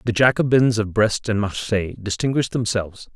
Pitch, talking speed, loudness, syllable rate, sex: 110 Hz, 150 wpm, -20 LUFS, 5.8 syllables/s, male